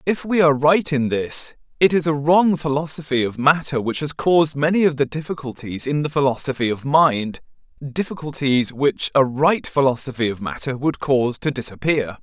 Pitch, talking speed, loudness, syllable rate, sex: 140 Hz, 170 wpm, -20 LUFS, 5.2 syllables/s, male